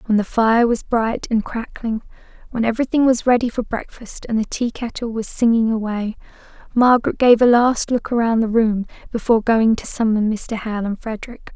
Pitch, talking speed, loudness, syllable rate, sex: 230 Hz, 180 wpm, -18 LUFS, 5.1 syllables/s, female